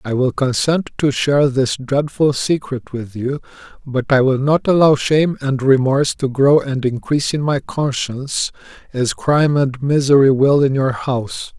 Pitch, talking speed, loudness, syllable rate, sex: 135 Hz, 170 wpm, -16 LUFS, 4.7 syllables/s, male